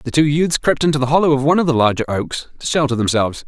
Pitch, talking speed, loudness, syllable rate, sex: 140 Hz, 275 wpm, -17 LUFS, 7.1 syllables/s, male